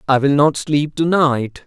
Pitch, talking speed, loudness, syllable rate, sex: 145 Hz, 215 wpm, -16 LUFS, 4.0 syllables/s, male